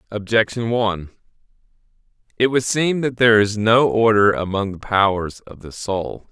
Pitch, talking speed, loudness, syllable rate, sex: 105 Hz, 150 wpm, -18 LUFS, 4.8 syllables/s, male